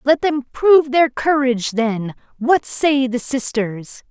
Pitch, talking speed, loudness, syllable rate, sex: 260 Hz, 130 wpm, -17 LUFS, 3.8 syllables/s, female